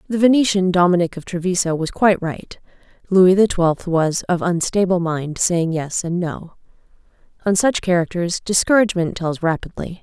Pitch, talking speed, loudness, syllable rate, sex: 180 Hz, 150 wpm, -18 LUFS, 5.0 syllables/s, female